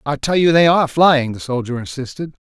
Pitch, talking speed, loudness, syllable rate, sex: 140 Hz, 220 wpm, -16 LUFS, 5.8 syllables/s, male